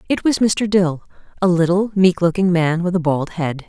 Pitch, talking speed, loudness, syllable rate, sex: 180 Hz, 210 wpm, -17 LUFS, 4.9 syllables/s, female